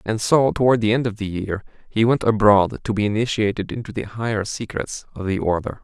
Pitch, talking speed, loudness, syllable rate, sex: 110 Hz, 215 wpm, -21 LUFS, 5.7 syllables/s, male